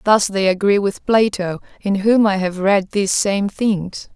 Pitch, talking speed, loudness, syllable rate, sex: 200 Hz, 190 wpm, -17 LUFS, 4.2 syllables/s, female